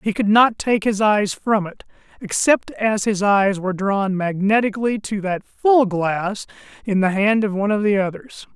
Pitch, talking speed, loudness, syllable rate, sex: 205 Hz, 180 wpm, -19 LUFS, 4.6 syllables/s, male